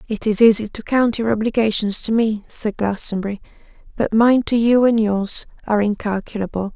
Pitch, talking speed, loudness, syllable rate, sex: 215 Hz, 170 wpm, -18 LUFS, 5.4 syllables/s, female